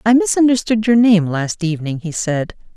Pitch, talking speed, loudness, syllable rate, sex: 200 Hz, 175 wpm, -16 LUFS, 5.2 syllables/s, female